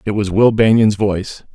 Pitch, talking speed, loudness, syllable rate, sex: 105 Hz, 195 wpm, -14 LUFS, 5.1 syllables/s, male